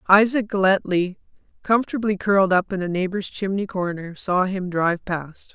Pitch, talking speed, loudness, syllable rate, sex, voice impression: 190 Hz, 150 wpm, -22 LUFS, 5.1 syllables/s, female, very feminine, adult-like, slightly middle-aged, thin, tensed, slightly powerful, slightly dark, hard, very clear, slightly halting, slightly cool, intellectual, slightly refreshing, sincere, calm, slightly friendly, slightly reassuring, slightly unique, slightly elegant, wild, slightly lively, strict, sharp